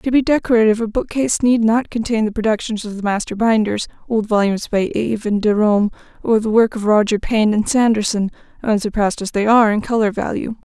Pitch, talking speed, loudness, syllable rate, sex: 220 Hz, 185 wpm, -17 LUFS, 6.3 syllables/s, female